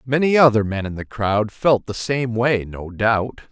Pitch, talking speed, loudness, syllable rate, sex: 115 Hz, 205 wpm, -19 LUFS, 4.2 syllables/s, male